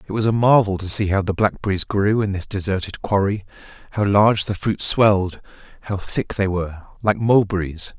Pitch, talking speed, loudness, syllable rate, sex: 100 Hz, 180 wpm, -20 LUFS, 5.4 syllables/s, male